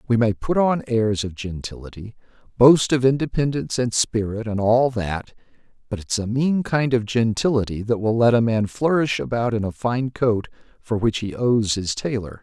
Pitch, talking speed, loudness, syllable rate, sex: 115 Hz, 190 wpm, -21 LUFS, 4.8 syllables/s, male